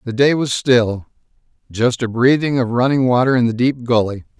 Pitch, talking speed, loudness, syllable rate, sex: 125 Hz, 180 wpm, -16 LUFS, 5.1 syllables/s, male